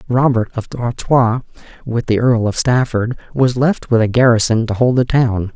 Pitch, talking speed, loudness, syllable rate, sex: 120 Hz, 185 wpm, -15 LUFS, 4.7 syllables/s, male